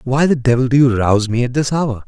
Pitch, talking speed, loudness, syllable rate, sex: 130 Hz, 290 wpm, -15 LUFS, 6.1 syllables/s, male